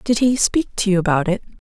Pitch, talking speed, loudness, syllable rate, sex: 205 Hz, 255 wpm, -18 LUFS, 6.2 syllables/s, female